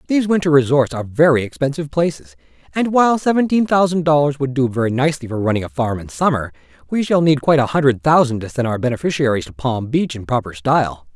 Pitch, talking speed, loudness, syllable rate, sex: 140 Hz, 210 wpm, -17 LUFS, 6.6 syllables/s, male